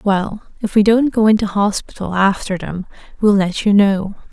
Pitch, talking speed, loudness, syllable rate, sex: 205 Hz, 180 wpm, -16 LUFS, 4.8 syllables/s, female